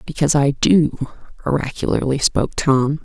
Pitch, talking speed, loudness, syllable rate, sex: 140 Hz, 120 wpm, -18 LUFS, 5.2 syllables/s, female